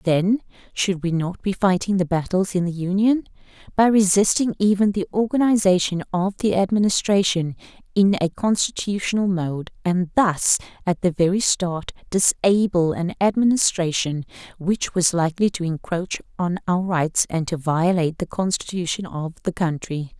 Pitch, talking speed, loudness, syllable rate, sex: 185 Hz, 145 wpm, -21 LUFS, 4.7 syllables/s, female